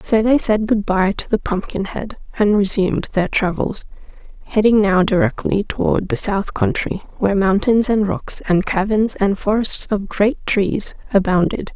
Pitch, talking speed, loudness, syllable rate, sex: 205 Hz, 160 wpm, -18 LUFS, 4.5 syllables/s, female